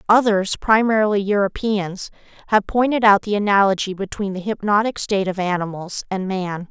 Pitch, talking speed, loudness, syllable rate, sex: 200 Hz, 145 wpm, -19 LUFS, 5.3 syllables/s, female